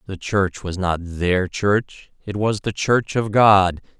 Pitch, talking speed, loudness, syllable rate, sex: 100 Hz, 165 wpm, -19 LUFS, 3.4 syllables/s, male